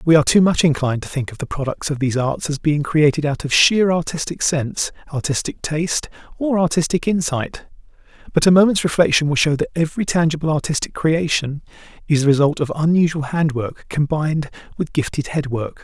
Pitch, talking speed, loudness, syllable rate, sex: 155 Hz, 185 wpm, -18 LUFS, 5.8 syllables/s, male